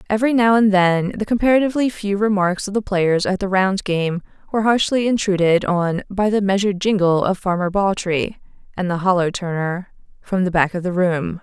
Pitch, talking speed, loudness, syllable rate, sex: 195 Hz, 190 wpm, -18 LUFS, 5.4 syllables/s, female